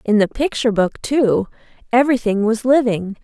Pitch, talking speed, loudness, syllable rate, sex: 230 Hz, 150 wpm, -17 LUFS, 5.2 syllables/s, female